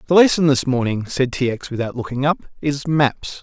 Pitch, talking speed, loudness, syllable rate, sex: 135 Hz, 210 wpm, -19 LUFS, 5.1 syllables/s, male